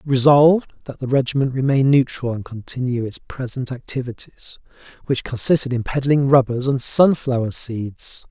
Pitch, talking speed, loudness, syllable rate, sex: 130 Hz, 130 wpm, -19 LUFS, 5.0 syllables/s, male